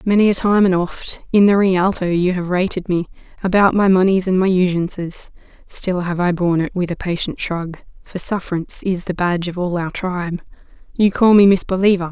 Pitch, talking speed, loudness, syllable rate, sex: 185 Hz, 200 wpm, -17 LUFS, 5.4 syllables/s, female